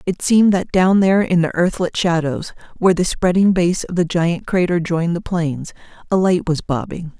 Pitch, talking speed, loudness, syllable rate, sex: 175 Hz, 200 wpm, -17 LUFS, 5.1 syllables/s, female